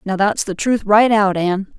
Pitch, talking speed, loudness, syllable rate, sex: 205 Hz, 235 wpm, -16 LUFS, 5.0 syllables/s, female